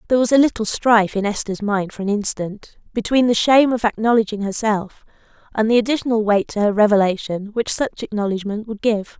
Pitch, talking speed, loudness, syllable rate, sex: 215 Hz, 190 wpm, -19 LUFS, 5.8 syllables/s, female